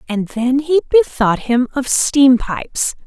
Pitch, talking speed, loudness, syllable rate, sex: 260 Hz, 155 wpm, -15 LUFS, 3.8 syllables/s, female